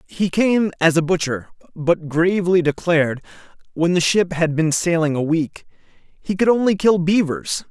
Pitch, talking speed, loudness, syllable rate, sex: 170 Hz, 165 wpm, -18 LUFS, 4.6 syllables/s, male